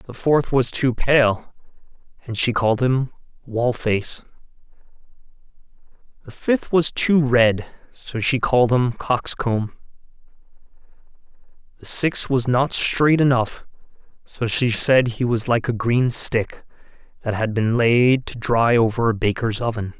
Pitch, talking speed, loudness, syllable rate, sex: 120 Hz, 135 wpm, -19 LUFS, 4.0 syllables/s, male